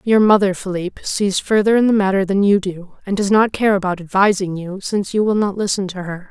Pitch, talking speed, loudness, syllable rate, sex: 195 Hz, 240 wpm, -17 LUFS, 5.6 syllables/s, female